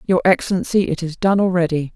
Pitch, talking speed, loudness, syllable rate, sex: 175 Hz, 185 wpm, -18 LUFS, 6.3 syllables/s, female